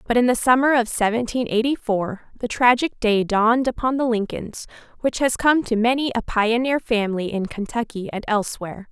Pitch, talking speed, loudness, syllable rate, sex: 230 Hz, 180 wpm, -21 LUFS, 5.4 syllables/s, female